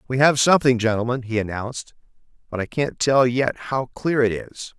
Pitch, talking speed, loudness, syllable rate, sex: 125 Hz, 190 wpm, -21 LUFS, 5.2 syllables/s, male